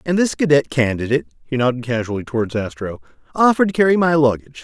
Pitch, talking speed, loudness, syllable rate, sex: 135 Hz, 155 wpm, -18 LUFS, 7.1 syllables/s, male